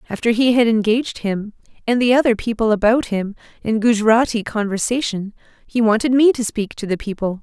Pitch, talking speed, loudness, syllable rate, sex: 225 Hz, 180 wpm, -18 LUFS, 5.5 syllables/s, female